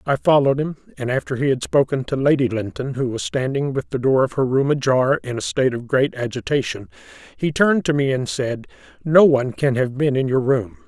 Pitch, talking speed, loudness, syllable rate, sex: 135 Hz, 225 wpm, -20 LUFS, 5.7 syllables/s, male